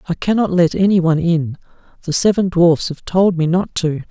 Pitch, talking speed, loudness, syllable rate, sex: 175 Hz, 205 wpm, -16 LUFS, 5.3 syllables/s, male